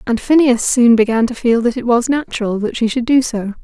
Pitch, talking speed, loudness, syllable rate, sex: 240 Hz, 245 wpm, -14 LUFS, 5.5 syllables/s, female